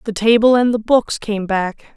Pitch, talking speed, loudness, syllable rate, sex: 220 Hz, 215 wpm, -16 LUFS, 4.6 syllables/s, female